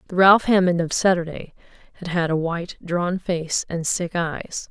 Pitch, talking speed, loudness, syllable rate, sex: 175 Hz, 180 wpm, -21 LUFS, 4.6 syllables/s, female